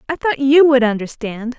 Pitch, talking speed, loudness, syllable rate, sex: 260 Hz, 190 wpm, -15 LUFS, 5.0 syllables/s, female